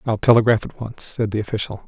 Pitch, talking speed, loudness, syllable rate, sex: 110 Hz, 225 wpm, -20 LUFS, 6.3 syllables/s, male